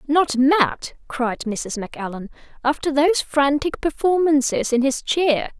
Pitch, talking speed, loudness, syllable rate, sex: 275 Hz, 130 wpm, -20 LUFS, 4.1 syllables/s, female